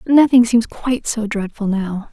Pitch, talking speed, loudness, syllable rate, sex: 225 Hz, 170 wpm, -17 LUFS, 4.6 syllables/s, female